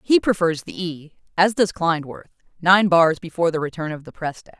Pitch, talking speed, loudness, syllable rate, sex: 170 Hz, 170 wpm, -20 LUFS, 5.4 syllables/s, female